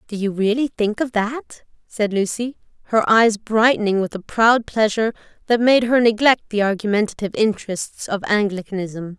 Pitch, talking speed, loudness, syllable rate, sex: 215 Hz, 155 wpm, -19 LUFS, 5.1 syllables/s, female